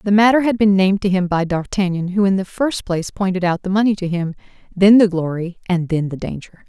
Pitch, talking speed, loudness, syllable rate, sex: 190 Hz, 245 wpm, -17 LUFS, 5.9 syllables/s, female